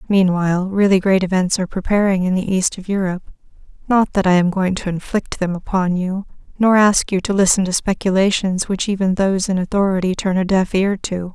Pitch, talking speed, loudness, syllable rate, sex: 190 Hz, 195 wpm, -17 LUFS, 5.8 syllables/s, female